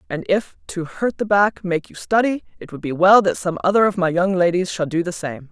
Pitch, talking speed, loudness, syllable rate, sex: 185 Hz, 260 wpm, -19 LUFS, 5.4 syllables/s, female